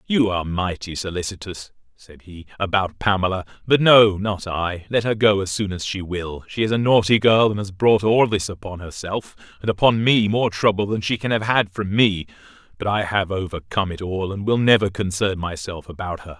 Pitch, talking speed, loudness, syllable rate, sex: 100 Hz, 210 wpm, -20 LUFS, 5.2 syllables/s, male